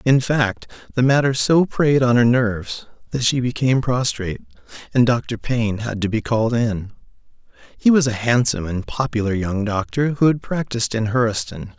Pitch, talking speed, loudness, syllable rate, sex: 120 Hz, 175 wpm, -19 LUFS, 5.2 syllables/s, male